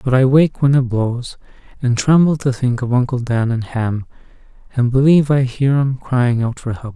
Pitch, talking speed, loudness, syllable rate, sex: 130 Hz, 205 wpm, -16 LUFS, 4.9 syllables/s, male